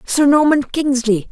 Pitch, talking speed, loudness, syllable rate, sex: 270 Hz, 135 wpm, -15 LUFS, 4.2 syllables/s, female